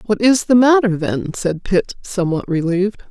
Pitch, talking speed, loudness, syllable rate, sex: 195 Hz, 175 wpm, -17 LUFS, 4.9 syllables/s, female